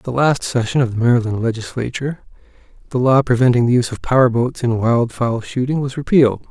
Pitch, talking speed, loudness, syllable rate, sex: 125 Hz, 205 wpm, -17 LUFS, 6.2 syllables/s, male